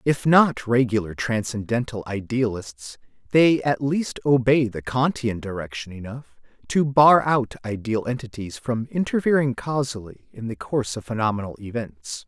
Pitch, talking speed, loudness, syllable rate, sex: 120 Hz, 130 wpm, -22 LUFS, 4.6 syllables/s, male